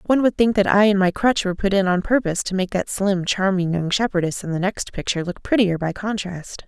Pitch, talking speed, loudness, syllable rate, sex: 195 Hz, 250 wpm, -20 LUFS, 6.0 syllables/s, female